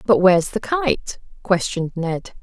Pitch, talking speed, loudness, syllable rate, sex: 195 Hz, 150 wpm, -20 LUFS, 4.5 syllables/s, female